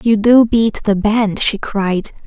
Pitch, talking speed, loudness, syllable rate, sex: 215 Hz, 185 wpm, -14 LUFS, 3.5 syllables/s, female